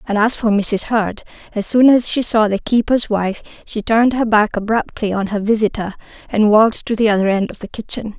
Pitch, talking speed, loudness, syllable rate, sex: 215 Hz, 220 wpm, -16 LUFS, 5.5 syllables/s, female